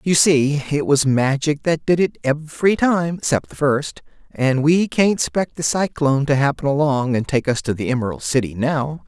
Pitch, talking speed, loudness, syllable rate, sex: 145 Hz, 200 wpm, -19 LUFS, 4.7 syllables/s, male